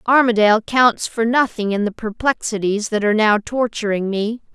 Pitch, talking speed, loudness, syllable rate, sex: 220 Hz, 160 wpm, -18 LUFS, 5.1 syllables/s, female